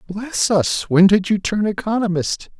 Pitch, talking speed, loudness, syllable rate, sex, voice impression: 195 Hz, 160 wpm, -18 LUFS, 4.2 syllables/s, male, very masculine, adult-like, slightly thick, cool, sincere, slightly calm, slightly kind